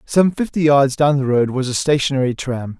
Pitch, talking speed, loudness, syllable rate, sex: 140 Hz, 215 wpm, -17 LUFS, 5.2 syllables/s, male